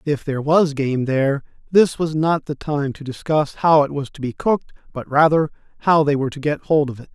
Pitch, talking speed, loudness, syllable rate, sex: 145 Hz, 235 wpm, -19 LUFS, 5.5 syllables/s, male